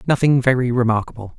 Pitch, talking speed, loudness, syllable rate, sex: 125 Hz, 130 wpm, -17 LUFS, 6.5 syllables/s, male